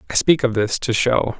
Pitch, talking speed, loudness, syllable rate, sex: 120 Hz, 260 wpm, -18 LUFS, 5.2 syllables/s, male